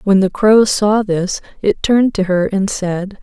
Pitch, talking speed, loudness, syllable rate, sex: 200 Hz, 205 wpm, -15 LUFS, 4.1 syllables/s, female